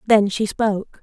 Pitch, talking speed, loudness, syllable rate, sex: 210 Hz, 175 wpm, -19 LUFS, 4.9 syllables/s, female